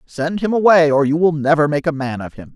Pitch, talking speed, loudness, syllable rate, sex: 155 Hz, 280 wpm, -16 LUFS, 5.8 syllables/s, male